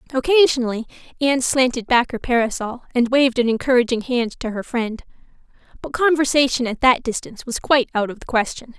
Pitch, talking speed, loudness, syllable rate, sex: 245 Hz, 170 wpm, -19 LUFS, 6.1 syllables/s, female